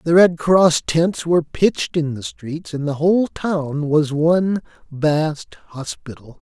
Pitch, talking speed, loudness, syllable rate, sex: 160 Hz, 155 wpm, -18 LUFS, 3.9 syllables/s, male